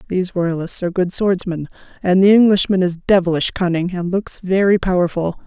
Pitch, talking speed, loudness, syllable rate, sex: 180 Hz, 165 wpm, -17 LUFS, 5.5 syllables/s, female